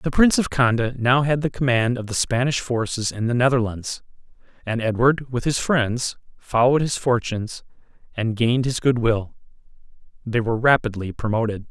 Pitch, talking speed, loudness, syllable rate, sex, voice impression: 120 Hz, 165 wpm, -21 LUFS, 5.3 syllables/s, male, masculine, adult-like, slightly fluent, slightly refreshing, sincere, friendly, reassuring, slightly elegant, slightly sweet